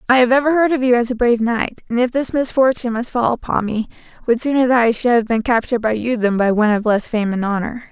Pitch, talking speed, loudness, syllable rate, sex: 235 Hz, 275 wpm, -17 LUFS, 6.5 syllables/s, female